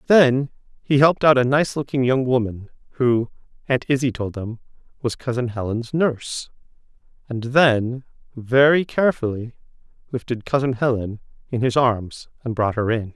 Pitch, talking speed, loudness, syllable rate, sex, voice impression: 125 Hz, 145 wpm, -20 LUFS, 4.8 syllables/s, male, masculine, adult-like, slightly refreshing, sincere, slightly kind